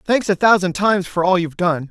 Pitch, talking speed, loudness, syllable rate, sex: 185 Hz, 250 wpm, -17 LUFS, 6.1 syllables/s, male